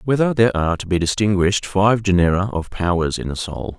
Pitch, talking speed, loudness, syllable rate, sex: 95 Hz, 205 wpm, -19 LUFS, 6.0 syllables/s, male